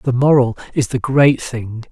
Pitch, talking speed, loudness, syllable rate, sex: 125 Hz, 190 wpm, -16 LUFS, 4.4 syllables/s, male